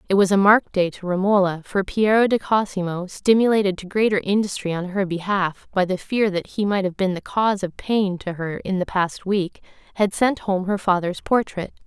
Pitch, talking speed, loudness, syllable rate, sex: 195 Hz, 210 wpm, -21 LUFS, 5.2 syllables/s, female